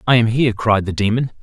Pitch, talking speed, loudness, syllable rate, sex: 115 Hz, 250 wpm, -17 LUFS, 6.6 syllables/s, male